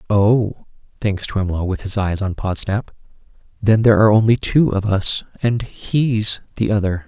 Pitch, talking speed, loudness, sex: 105 Hz, 160 wpm, -18 LUFS, male